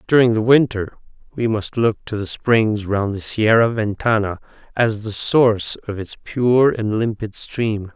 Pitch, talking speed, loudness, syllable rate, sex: 110 Hz, 165 wpm, -19 LUFS, 4.2 syllables/s, male